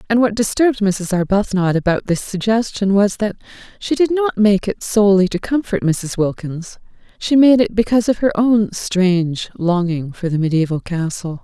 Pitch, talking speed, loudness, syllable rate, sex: 200 Hz, 175 wpm, -17 LUFS, 4.9 syllables/s, female